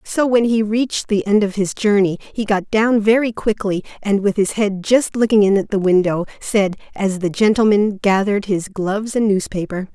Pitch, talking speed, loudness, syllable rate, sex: 205 Hz, 200 wpm, -17 LUFS, 5.0 syllables/s, female